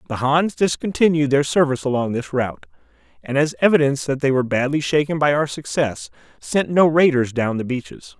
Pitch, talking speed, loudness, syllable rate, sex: 140 Hz, 185 wpm, -19 LUFS, 5.8 syllables/s, male